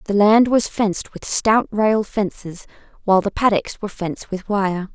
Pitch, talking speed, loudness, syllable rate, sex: 205 Hz, 180 wpm, -19 LUFS, 4.8 syllables/s, female